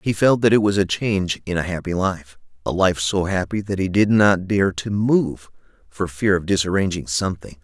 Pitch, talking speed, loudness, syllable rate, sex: 95 Hz, 210 wpm, -20 LUFS, 5.1 syllables/s, male